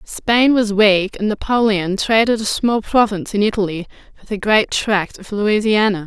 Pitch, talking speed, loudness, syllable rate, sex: 210 Hz, 170 wpm, -16 LUFS, 4.6 syllables/s, female